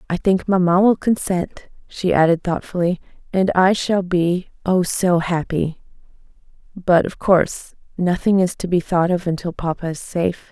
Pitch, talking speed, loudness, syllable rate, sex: 180 Hz, 150 wpm, -19 LUFS, 4.6 syllables/s, female